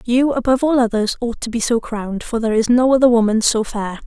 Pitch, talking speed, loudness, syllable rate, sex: 235 Hz, 250 wpm, -17 LUFS, 6.2 syllables/s, female